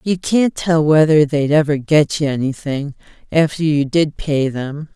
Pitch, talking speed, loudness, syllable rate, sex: 150 Hz, 170 wpm, -16 LUFS, 4.3 syllables/s, female